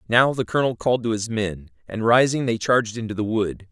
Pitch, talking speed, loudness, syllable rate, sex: 115 Hz, 225 wpm, -21 LUFS, 6.0 syllables/s, male